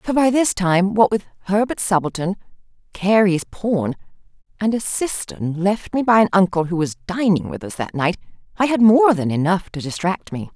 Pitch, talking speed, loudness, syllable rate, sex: 195 Hz, 190 wpm, -19 LUFS, 4.9 syllables/s, female